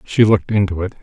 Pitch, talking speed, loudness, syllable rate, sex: 100 Hz, 235 wpm, -16 LUFS, 7.1 syllables/s, male